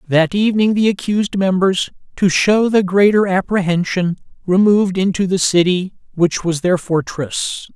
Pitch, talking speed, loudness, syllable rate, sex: 185 Hz, 140 wpm, -16 LUFS, 4.7 syllables/s, male